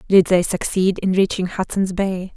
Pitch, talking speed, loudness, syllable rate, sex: 185 Hz, 180 wpm, -19 LUFS, 4.6 syllables/s, female